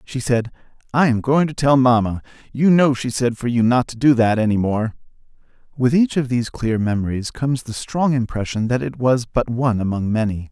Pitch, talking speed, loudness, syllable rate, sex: 125 Hz, 210 wpm, -19 LUFS, 5.4 syllables/s, male